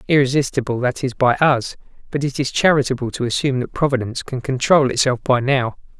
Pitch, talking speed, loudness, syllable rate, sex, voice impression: 130 Hz, 180 wpm, -18 LUFS, 6.0 syllables/s, male, masculine, adult-like, tensed, bright, clear, raspy, slightly sincere, friendly, unique, slightly wild, slightly kind